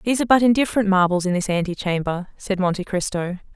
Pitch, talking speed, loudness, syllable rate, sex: 195 Hz, 205 wpm, -20 LUFS, 6.9 syllables/s, female